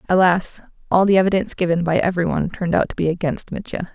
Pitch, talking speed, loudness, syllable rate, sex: 180 Hz, 215 wpm, -19 LUFS, 7.2 syllables/s, female